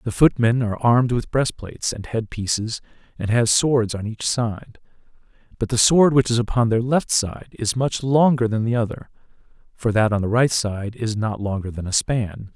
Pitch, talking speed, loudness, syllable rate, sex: 115 Hz, 200 wpm, -20 LUFS, 4.9 syllables/s, male